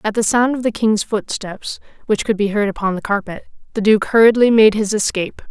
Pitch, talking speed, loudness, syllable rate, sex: 210 Hz, 220 wpm, -16 LUFS, 5.6 syllables/s, female